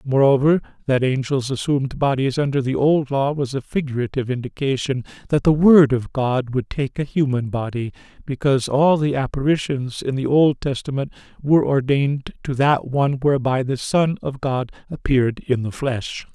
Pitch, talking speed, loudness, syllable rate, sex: 135 Hz, 165 wpm, -20 LUFS, 5.2 syllables/s, male